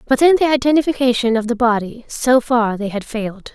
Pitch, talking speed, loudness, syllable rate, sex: 240 Hz, 205 wpm, -16 LUFS, 5.7 syllables/s, female